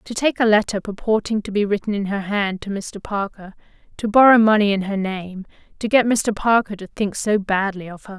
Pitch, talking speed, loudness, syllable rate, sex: 205 Hz, 220 wpm, -19 LUFS, 5.3 syllables/s, female